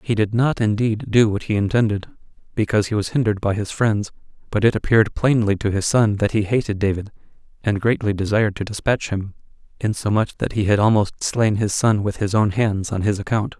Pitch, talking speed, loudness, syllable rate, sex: 105 Hz, 205 wpm, -20 LUFS, 5.8 syllables/s, male